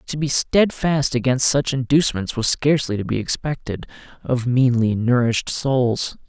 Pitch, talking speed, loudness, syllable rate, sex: 130 Hz, 145 wpm, -19 LUFS, 4.7 syllables/s, male